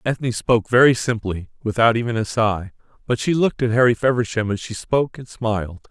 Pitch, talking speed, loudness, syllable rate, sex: 115 Hz, 195 wpm, -20 LUFS, 5.8 syllables/s, male